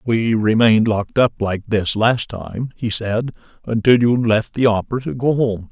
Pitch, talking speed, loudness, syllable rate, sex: 115 Hz, 190 wpm, -18 LUFS, 4.7 syllables/s, male